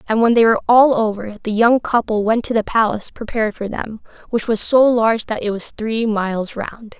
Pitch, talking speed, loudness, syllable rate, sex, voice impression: 220 Hz, 225 wpm, -17 LUFS, 5.5 syllables/s, female, feminine, slightly adult-like, slightly soft, slightly cute, friendly, slightly lively, slightly kind